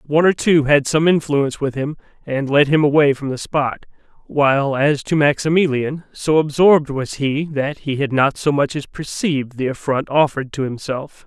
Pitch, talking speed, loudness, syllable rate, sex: 145 Hz, 190 wpm, -18 LUFS, 5.1 syllables/s, male